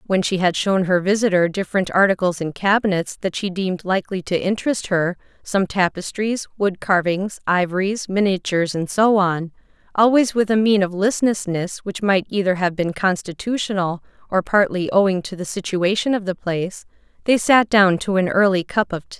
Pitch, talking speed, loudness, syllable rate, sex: 190 Hz, 170 wpm, -19 LUFS, 5.3 syllables/s, female